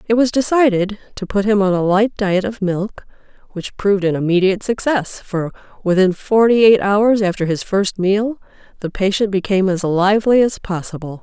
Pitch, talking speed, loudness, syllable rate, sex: 200 Hz, 175 wpm, -16 LUFS, 5.2 syllables/s, female